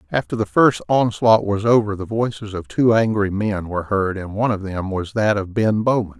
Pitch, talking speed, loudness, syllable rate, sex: 105 Hz, 225 wpm, -19 LUFS, 5.3 syllables/s, male